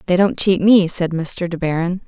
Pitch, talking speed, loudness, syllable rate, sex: 180 Hz, 230 wpm, -17 LUFS, 4.8 syllables/s, female